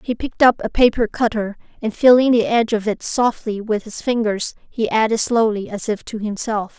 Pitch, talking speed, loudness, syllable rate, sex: 225 Hz, 205 wpm, -18 LUFS, 5.2 syllables/s, female